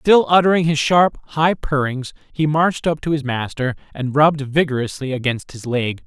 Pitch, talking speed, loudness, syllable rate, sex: 145 Hz, 180 wpm, -18 LUFS, 4.9 syllables/s, male